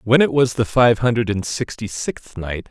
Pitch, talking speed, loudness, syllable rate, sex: 115 Hz, 220 wpm, -19 LUFS, 4.6 syllables/s, male